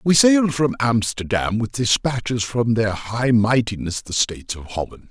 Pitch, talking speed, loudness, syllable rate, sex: 115 Hz, 165 wpm, -20 LUFS, 4.8 syllables/s, male